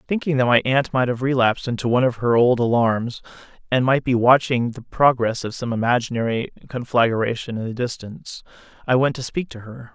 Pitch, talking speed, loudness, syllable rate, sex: 120 Hz, 195 wpm, -20 LUFS, 5.6 syllables/s, male